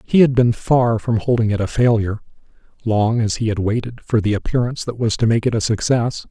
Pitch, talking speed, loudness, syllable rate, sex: 115 Hz, 220 wpm, -18 LUFS, 5.7 syllables/s, male